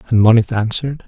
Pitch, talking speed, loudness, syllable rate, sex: 115 Hz, 170 wpm, -15 LUFS, 7.0 syllables/s, male